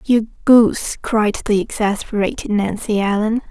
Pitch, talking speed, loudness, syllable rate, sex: 215 Hz, 120 wpm, -17 LUFS, 4.4 syllables/s, female